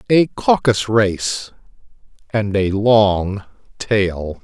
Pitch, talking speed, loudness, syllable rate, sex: 105 Hz, 95 wpm, -17 LUFS, 2.5 syllables/s, male